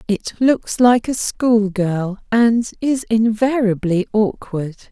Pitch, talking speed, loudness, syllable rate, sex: 220 Hz, 120 wpm, -17 LUFS, 3.3 syllables/s, female